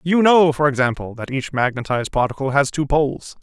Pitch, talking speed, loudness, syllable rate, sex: 140 Hz, 190 wpm, -19 LUFS, 5.8 syllables/s, male